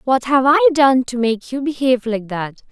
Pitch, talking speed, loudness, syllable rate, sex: 255 Hz, 220 wpm, -16 LUFS, 5.1 syllables/s, female